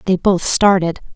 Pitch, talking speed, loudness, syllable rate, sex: 185 Hz, 155 wpm, -15 LUFS, 4.4 syllables/s, female